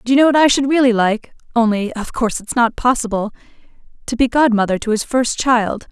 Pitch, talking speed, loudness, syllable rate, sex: 235 Hz, 205 wpm, -16 LUFS, 5.8 syllables/s, female